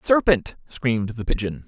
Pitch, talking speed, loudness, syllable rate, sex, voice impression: 120 Hz, 145 wpm, -23 LUFS, 4.9 syllables/s, male, very masculine, very adult-like, very middle-aged, very thick, tensed, very powerful, slightly bright, slightly soft, slightly muffled, very fluent, very cool, very intellectual, slightly refreshing, very sincere, very calm, very mature, very friendly, reassuring, unique, elegant, slightly wild, very lively, kind, slightly intense